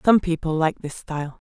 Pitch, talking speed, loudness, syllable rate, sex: 160 Hz, 205 wpm, -23 LUFS, 5.3 syllables/s, female